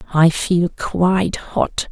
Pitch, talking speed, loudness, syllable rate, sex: 175 Hz, 125 wpm, -18 LUFS, 3.1 syllables/s, female